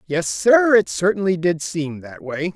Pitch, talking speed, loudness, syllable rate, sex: 170 Hz, 190 wpm, -18 LUFS, 4.1 syllables/s, male